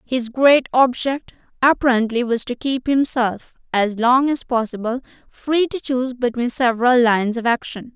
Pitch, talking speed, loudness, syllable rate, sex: 250 Hz, 150 wpm, -18 LUFS, 4.7 syllables/s, female